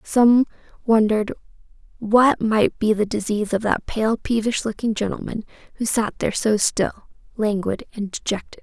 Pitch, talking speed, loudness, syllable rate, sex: 220 Hz, 145 wpm, -21 LUFS, 5.0 syllables/s, female